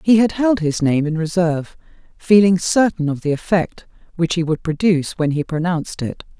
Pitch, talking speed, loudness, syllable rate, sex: 170 Hz, 190 wpm, -18 LUFS, 5.3 syllables/s, female